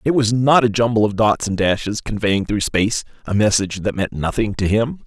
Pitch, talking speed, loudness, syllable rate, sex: 110 Hz, 225 wpm, -18 LUFS, 5.5 syllables/s, male